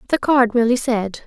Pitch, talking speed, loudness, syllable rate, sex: 240 Hz, 190 wpm, -17 LUFS, 5.7 syllables/s, female